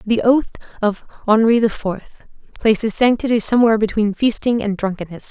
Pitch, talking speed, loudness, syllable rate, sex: 220 Hz, 145 wpm, -17 LUFS, 5.6 syllables/s, female